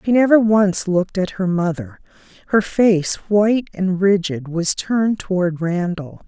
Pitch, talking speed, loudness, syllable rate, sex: 190 Hz, 155 wpm, -18 LUFS, 4.3 syllables/s, female